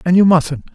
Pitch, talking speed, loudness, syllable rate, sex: 165 Hz, 240 wpm, -13 LUFS, 5.3 syllables/s, male